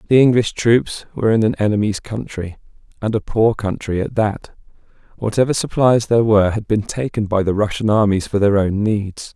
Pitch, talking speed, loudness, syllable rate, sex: 105 Hz, 185 wpm, -17 LUFS, 5.4 syllables/s, male